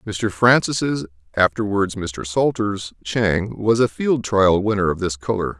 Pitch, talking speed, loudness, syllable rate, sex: 105 Hz, 150 wpm, -20 LUFS, 4.0 syllables/s, male